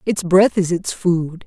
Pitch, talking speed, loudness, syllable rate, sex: 180 Hz, 205 wpm, -17 LUFS, 3.7 syllables/s, female